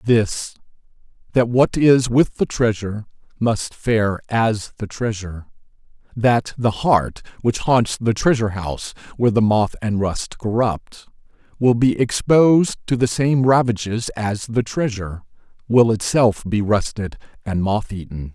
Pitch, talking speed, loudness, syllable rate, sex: 110 Hz, 140 wpm, -19 LUFS, 4.2 syllables/s, male